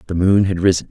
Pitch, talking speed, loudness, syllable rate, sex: 90 Hz, 265 wpm, -16 LUFS, 6.9 syllables/s, male